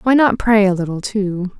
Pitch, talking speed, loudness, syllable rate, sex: 205 Hz, 225 wpm, -16 LUFS, 4.8 syllables/s, female